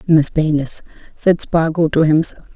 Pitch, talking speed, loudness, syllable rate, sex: 160 Hz, 140 wpm, -16 LUFS, 4.4 syllables/s, female